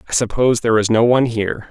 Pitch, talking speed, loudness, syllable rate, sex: 115 Hz, 245 wpm, -16 LUFS, 7.8 syllables/s, male